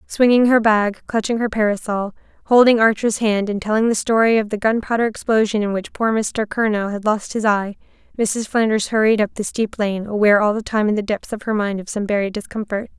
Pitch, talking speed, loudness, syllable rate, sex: 215 Hz, 215 wpm, -18 LUFS, 5.6 syllables/s, female